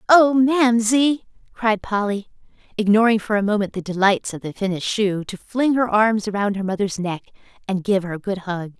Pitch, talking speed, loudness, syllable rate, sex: 210 Hz, 190 wpm, -20 LUFS, 5.2 syllables/s, female